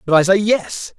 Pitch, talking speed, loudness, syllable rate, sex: 165 Hz, 245 wpm, -15 LUFS, 4.7 syllables/s, male